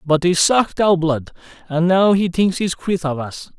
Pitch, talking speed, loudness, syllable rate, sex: 175 Hz, 220 wpm, -17 LUFS, 4.6 syllables/s, male